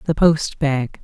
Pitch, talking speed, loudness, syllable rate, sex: 150 Hz, 175 wpm, -18 LUFS, 3.5 syllables/s, female